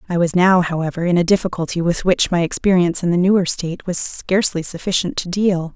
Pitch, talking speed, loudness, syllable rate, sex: 175 Hz, 210 wpm, -18 LUFS, 6.1 syllables/s, female